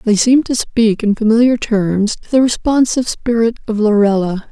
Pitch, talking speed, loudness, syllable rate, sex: 225 Hz, 175 wpm, -14 LUFS, 5.2 syllables/s, female